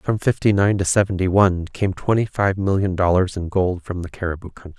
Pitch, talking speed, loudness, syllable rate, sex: 95 Hz, 215 wpm, -20 LUFS, 5.7 syllables/s, male